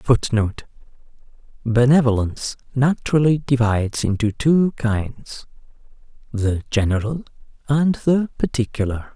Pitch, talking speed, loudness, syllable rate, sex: 125 Hz, 80 wpm, -20 LUFS, 4.5 syllables/s, male